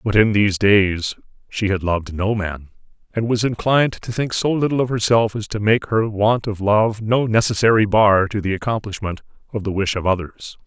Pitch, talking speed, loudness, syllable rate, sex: 105 Hz, 200 wpm, -19 LUFS, 5.2 syllables/s, male